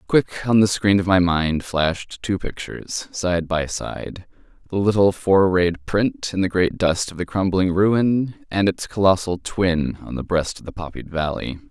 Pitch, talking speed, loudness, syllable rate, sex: 90 Hz, 185 wpm, -21 LUFS, 4.2 syllables/s, male